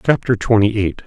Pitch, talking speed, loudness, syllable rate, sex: 110 Hz, 170 wpm, -16 LUFS, 5.4 syllables/s, male